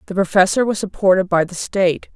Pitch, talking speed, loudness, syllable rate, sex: 190 Hz, 195 wpm, -17 LUFS, 6.1 syllables/s, female